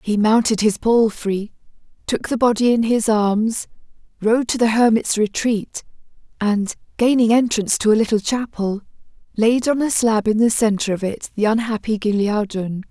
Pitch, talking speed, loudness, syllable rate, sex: 220 Hz, 160 wpm, -18 LUFS, 4.7 syllables/s, female